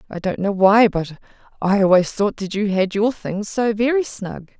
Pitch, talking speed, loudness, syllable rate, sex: 205 Hz, 210 wpm, -19 LUFS, 4.6 syllables/s, female